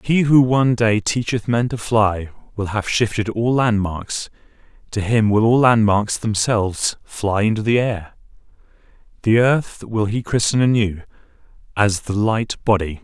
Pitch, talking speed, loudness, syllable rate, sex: 110 Hz, 145 wpm, -18 LUFS, 4.3 syllables/s, male